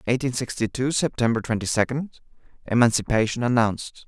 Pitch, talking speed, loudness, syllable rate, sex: 120 Hz, 105 wpm, -23 LUFS, 5.8 syllables/s, male